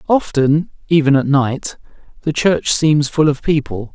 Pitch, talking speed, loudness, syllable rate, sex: 145 Hz, 150 wpm, -15 LUFS, 4.2 syllables/s, male